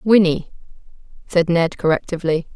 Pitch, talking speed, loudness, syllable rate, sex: 170 Hz, 95 wpm, -19 LUFS, 5.3 syllables/s, female